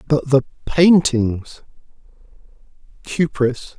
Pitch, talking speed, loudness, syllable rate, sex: 140 Hz, 50 wpm, -17 LUFS, 2.9 syllables/s, male